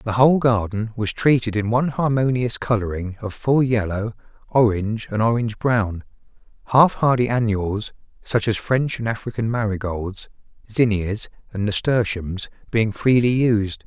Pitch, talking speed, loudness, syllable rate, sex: 115 Hz, 135 wpm, -21 LUFS, 4.7 syllables/s, male